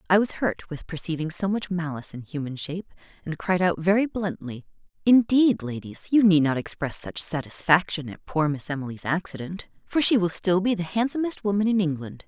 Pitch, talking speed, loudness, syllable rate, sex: 175 Hz, 190 wpm, -24 LUFS, 5.5 syllables/s, female